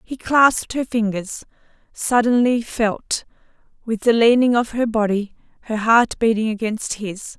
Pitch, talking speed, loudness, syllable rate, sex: 225 Hz, 130 wpm, -19 LUFS, 4.2 syllables/s, female